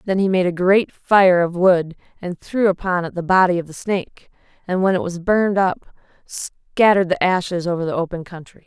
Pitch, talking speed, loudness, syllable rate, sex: 180 Hz, 210 wpm, -18 LUFS, 5.1 syllables/s, female